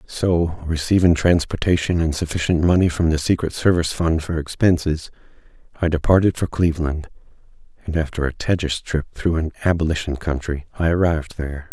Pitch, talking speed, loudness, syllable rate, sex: 80 Hz, 150 wpm, -20 LUFS, 5.4 syllables/s, male